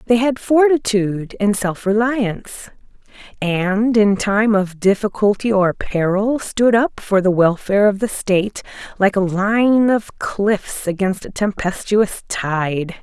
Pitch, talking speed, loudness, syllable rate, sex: 205 Hz, 140 wpm, -17 LUFS, 3.9 syllables/s, female